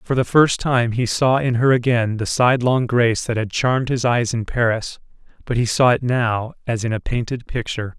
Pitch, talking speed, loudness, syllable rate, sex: 120 Hz, 220 wpm, -19 LUFS, 5.2 syllables/s, male